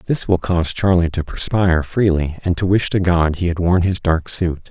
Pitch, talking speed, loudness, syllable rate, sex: 90 Hz, 230 wpm, -18 LUFS, 5.2 syllables/s, male